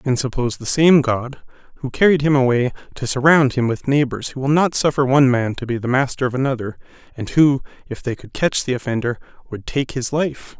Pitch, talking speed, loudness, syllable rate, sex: 130 Hz, 215 wpm, -18 LUFS, 5.7 syllables/s, male